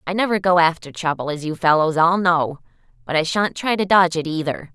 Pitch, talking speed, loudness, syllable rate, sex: 170 Hz, 230 wpm, -19 LUFS, 5.8 syllables/s, female